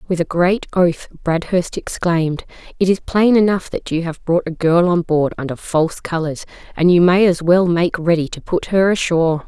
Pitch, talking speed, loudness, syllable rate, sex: 170 Hz, 205 wpm, -17 LUFS, 5.0 syllables/s, female